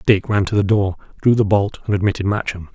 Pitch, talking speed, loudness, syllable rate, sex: 100 Hz, 240 wpm, -18 LUFS, 6.1 syllables/s, male